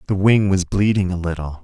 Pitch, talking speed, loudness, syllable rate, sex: 95 Hz, 220 wpm, -18 LUFS, 5.5 syllables/s, male